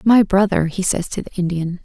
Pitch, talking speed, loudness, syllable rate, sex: 185 Hz, 230 wpm, -18 LUFS, 5.4 syllables/s, female